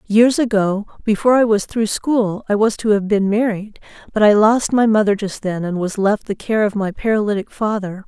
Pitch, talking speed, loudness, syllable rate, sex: 210 Hz, 215 wpm, -17 LUFS, 5.1 syllables/s, female